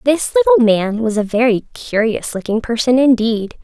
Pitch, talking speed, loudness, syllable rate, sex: 240 Hz, 165 wpm, -15 LUFS, 4.9 syllables/s, female